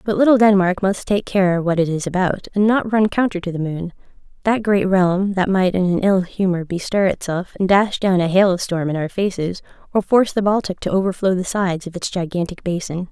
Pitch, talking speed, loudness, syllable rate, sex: 190 Hz, 225 wpm, -18 LUFS, 5.4 syllables/s, female